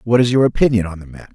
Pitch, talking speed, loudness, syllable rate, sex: 110 Hz, 310 wpm, -15 LUFS, 8.3 syllables/s, male